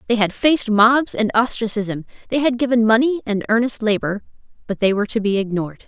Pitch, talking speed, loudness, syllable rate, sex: 220 Hz, 195 wpm, -18 LUFS, 5.9 syllables/s, female